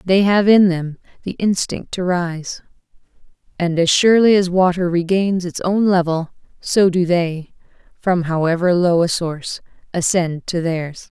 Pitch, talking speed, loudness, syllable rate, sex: 175 Hz, 150 wpm, -17 LUFS, 4.3 syllables/s, female